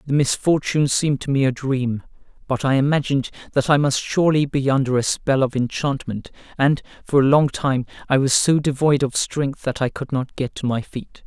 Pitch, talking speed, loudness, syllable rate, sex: 135 Hz, 210 wpm, -20 LUFS, 5.3 syllables/s, male